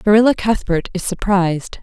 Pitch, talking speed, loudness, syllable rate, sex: 195 Hz, 130 wpm, -17 LUFS, 5.4 syllables/s, female